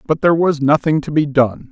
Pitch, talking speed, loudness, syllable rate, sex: 150 Hz, 245 wpm, -15 LUFS, 5.6 syllables/s, male